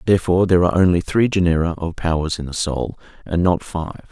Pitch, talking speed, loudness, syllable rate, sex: 85 Hz, 205 wpm, -19 LUFS, 6.3 syllables/s, male